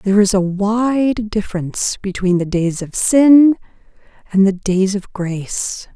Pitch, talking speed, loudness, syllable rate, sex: 200 Hz, 150 wpm, -16 LUFS, 4.1 syllables/s, female